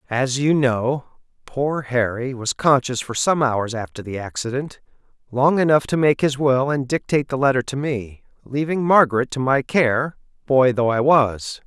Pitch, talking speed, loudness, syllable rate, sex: 130 Hz, 170 wpm, -20 LUFS, 4.6 syllables/s, male